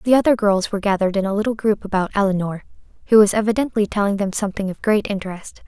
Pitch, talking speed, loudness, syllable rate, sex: 205 Hz, 210 wpm, -19 LUFS, 7.0 syllables/s, female